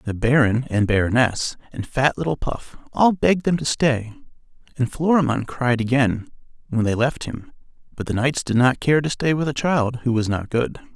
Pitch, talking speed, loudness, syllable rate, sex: 130 Hz, 195 wpm, -21 LUFS, 4.9 syllables/s, male